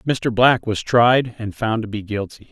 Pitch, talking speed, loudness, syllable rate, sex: 110 Hz, 215 wpm, -19 LUFS, 4.1 syllables/s, male